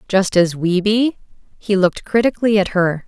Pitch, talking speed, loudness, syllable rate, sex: 200 Hz, 175 wpm, -17 LUFS, 5.2 syllables/s, female